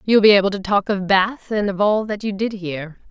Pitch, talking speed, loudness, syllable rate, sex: 200 Hz, 290 wpm, -18 LUFS, 5.9 syllables/s, female